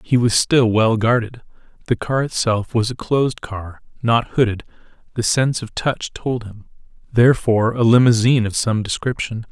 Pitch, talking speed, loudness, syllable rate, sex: 115 Hz, 150 wpm, -18 LUFS, 5.0 syllables/s, male